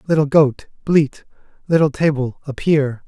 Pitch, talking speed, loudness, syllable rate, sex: 145 Hz, 115 wpm, -17 LUFS, 4.4 syllables/s, male